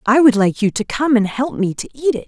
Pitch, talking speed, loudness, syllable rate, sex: 245 Hz, 315 wpm, -17 LUFS, 5.8 syllables/s, female